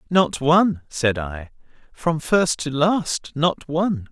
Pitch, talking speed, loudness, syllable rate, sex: 150 Hz, 145 wpm, -21 LUFS, 3.5 syllables/s, male